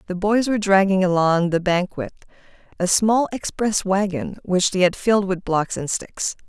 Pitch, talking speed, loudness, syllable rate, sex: 190 Hz, 175 wpm, -20 LUFS, 4.9 syllables/s, female